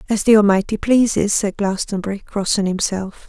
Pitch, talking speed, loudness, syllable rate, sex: 200 Hz, 145 wpm, -18 LUFS, 5.2 syllables/s, female